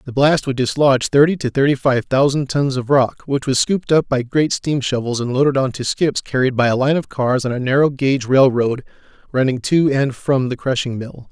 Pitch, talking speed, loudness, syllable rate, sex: 135 Hz, 230 wpm, -17 LUFS, 5.4 syllables/s, male